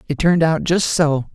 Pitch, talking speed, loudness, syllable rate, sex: 150 Hz, 220 wpm, -17 LUFS, 5.2 syllables/s, male